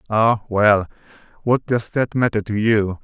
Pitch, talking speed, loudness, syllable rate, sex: 110 Hz, 160 wpm, -19 LUFS, 4.1 syllables/s, male